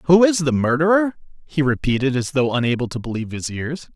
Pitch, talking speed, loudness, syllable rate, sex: 140 Hz, 195 wpm, -20 LUFS, 5.8 syllables/s, male